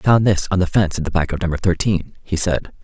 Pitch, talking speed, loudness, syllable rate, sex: 90 Hz, 295 wpm, -19 LUFS, 6.2 syllables/s, male